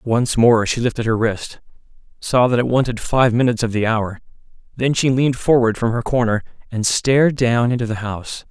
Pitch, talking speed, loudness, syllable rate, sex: 120 Hz, 200 wpm, -18 LUFS, 5.4 syllables/s, male